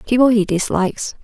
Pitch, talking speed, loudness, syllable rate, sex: 220 Hz, 145 wpm, -17 LUFS, 5.9 syllables/s, female